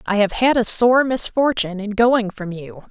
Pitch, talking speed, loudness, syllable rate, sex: 220 Hz, 205 wpm, -17 LUFS, 4.7 syllables/s, female